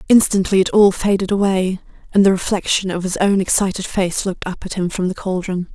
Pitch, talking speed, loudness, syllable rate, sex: 190 Hz, 210 wpm, -17 LUFS, 5.7 syllables/s, female